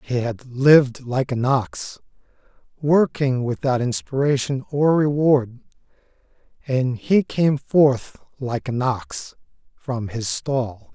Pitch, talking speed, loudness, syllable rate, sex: 130 Hz, 115 wpm, -21 LUFS, 3.4 syllables/s, male